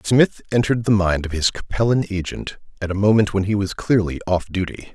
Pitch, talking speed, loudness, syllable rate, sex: 100 Hz, 205 wpm, -20 LUFS, 5.6 syllables/s, male